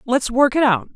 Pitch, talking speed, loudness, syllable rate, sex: 260 Hz, 250 wpm, -17 LUFS, 4.9 syllables/s, female